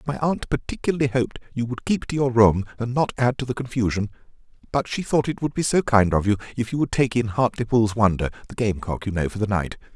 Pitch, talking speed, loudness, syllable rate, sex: 120 Hz, 240 wpm, -23 LUFS, 6.2 syllables/s, male